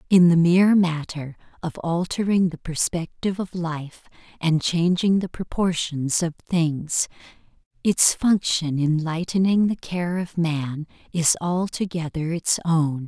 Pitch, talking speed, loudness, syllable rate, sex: 170 Hz, 130 wpm, -22 LUFS, 4.0 syllables/s, female